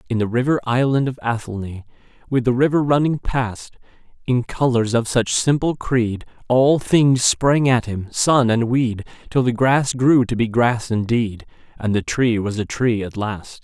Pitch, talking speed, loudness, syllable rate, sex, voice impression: 120 Hz, 180 wpm, -19 LUFS, 4.3 syllables/s, male, masculine, middle-aged, thick, tensed, powerful, slightly soft, clear, cool, intellectual, calm, mature, wild, lively